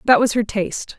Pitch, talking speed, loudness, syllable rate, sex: 225 Hz, 245 wpm, -19 LUFS, 6.0 syllables/s, female